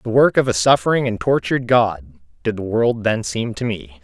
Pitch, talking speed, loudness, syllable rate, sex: 110 Hz, 225 wpm, -18 LUFS, 5.1 syllables/s, male